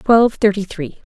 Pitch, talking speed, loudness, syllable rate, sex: 200 Hz, 165 wpm, -16 LUFS, 4.9 syllables/s, female